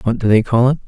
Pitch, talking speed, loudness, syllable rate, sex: 120 Hz, 340 wpm, -14 LUFS, 6.9 syllables/s, male